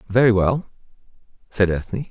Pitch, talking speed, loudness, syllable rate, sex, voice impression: 110 Hz, 115 wpm, -20 LUFS, 5.1 syllables/s, male, very masculine, slightly young, very adult-like, middle-aged, thick, relaxed, slightly powerful, dark, soft, slightly muffled, halting, slightly raspy, cool, very intellectual, slightly refreshing, sincere, very calm, mature, friendly, reassuring, unique, elegant, slightly wild, sweet, slightly lively, slightly strict, modest